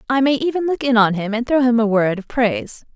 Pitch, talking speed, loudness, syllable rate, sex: 235 Hz, 285 wpm, -18 LUFS, 6.0 syllables/s, female